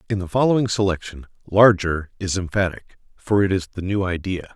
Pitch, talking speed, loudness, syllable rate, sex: 95 Hz, 170 wpm, -21 LUFS, 5.7 syllables/s, male